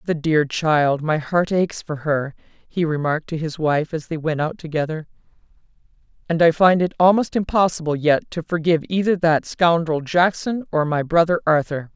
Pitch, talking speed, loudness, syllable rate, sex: 160 Hz, 175 wpm, -20 LUFS, 5.0 syllables/s, female